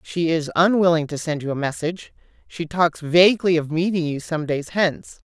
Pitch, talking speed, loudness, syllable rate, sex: 165 Hz, 190 wpm, -20 LUFS, 5.3 syllables/s, female